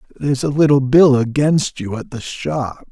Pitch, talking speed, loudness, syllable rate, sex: 135 Hz, 185 wpm, -16 LUFS, 4.7 syllables/s, male